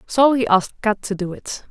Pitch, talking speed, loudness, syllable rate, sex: 215 Hz, 245 wpm, -19 LUFS, 5.5 syllables/s, female